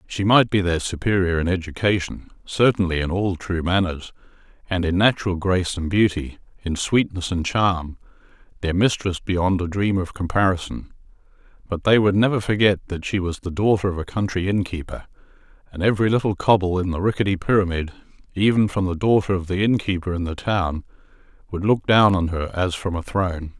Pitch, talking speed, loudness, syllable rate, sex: 95 Hz, 180 wpm, -21 LUFS, 5.5 syllables/s, male